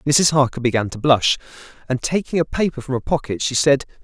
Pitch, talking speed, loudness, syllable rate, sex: 135 Hz, 210 wpm, -19 LUFS, 5.7 syllables/s, male